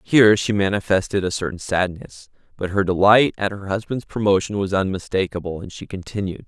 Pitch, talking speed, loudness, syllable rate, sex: 100 Hz, 165 wpm, -20 LUFS, 5.6 syllables/s, male